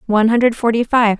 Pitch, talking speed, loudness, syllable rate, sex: 225 Hz, 200 wpm, -15 LUFS, 6.5 syllables/s, female